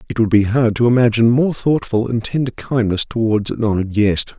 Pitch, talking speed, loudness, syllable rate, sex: 115 Hz, 205 wpm, -16 LUFS, 5.7 syllables/s, male